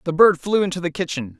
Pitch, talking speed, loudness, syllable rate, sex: 170 Hz, 260 wpm, -20 LUFS, 6.3 syllables/s, male